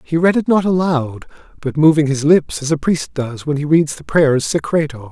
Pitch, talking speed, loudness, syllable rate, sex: 150 Hz, 225 wpm, -16 LUFS, 5.0 syllables/s, male